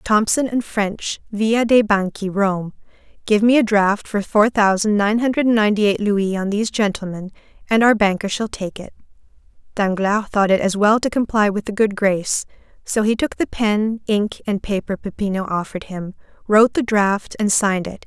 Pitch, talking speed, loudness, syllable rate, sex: 210 Hz, 185 wpm, -18 LUFS, 5.0 syllables/s, female